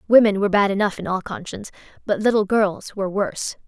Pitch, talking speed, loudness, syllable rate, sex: 200 Hz, 195 wpm, -21 LUFS, 6.6 syllables/s, female